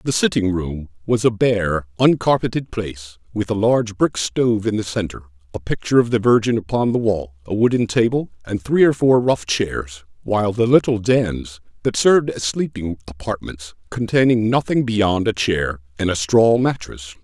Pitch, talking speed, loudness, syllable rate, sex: 105 Hz, 180 wpm, -19 LUFS, 4.9 syllables/s, male